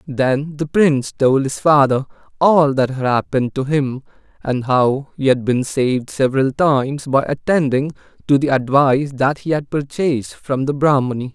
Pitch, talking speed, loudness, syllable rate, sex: 140 Hz, 170 wpm, -17 LUFS, 4.8 syllables/s, male